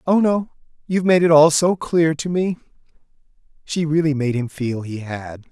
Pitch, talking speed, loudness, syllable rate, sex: 155 Hz, 185 wpm, -19 LUFS, 4.9 syllables/s, male